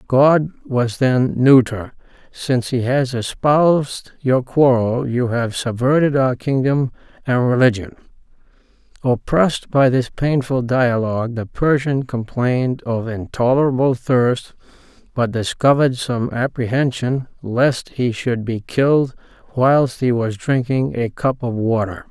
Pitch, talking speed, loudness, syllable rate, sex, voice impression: 125 Hz, 120 wpm, -18 LUFS, 4.0 syllables/s, male, masculine, middle-aged, weak, halting, raspy, sincere, calm, unique, kind, modest